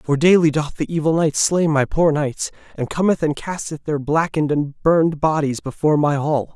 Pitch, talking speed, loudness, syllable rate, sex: 155 Hz, 200 wpm, -19 LUFS, 5.2 syllables/s, male